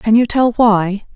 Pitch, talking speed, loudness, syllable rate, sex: 220 Hz, 210 wpm, -14 LUFS, 3.9 syllables/s, female